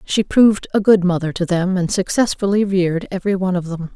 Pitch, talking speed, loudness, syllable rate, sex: 185 Hz, 210 wpm, -17 LUFS, 6.1 syllables/s, female